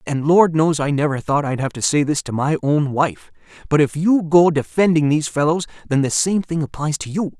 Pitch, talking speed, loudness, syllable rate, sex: 150 Hz, 220 wpm, -18 LUFS, 5.3 syllables/s, male